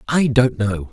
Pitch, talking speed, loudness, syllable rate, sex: 115 Hz, 195 wpm, -17 LUFS, 4.0 syllables/s, male